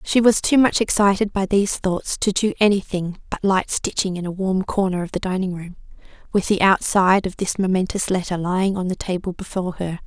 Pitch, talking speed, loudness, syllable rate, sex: 190 Hz, 210 wpm, -20 LUFS, 5.7 syllables/s, female